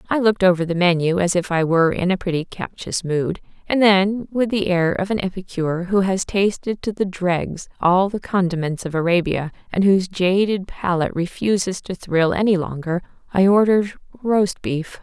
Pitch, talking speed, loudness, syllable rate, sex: 185 Hz, 185 wpm, -20 LUFS, 5.1 syllables/s, female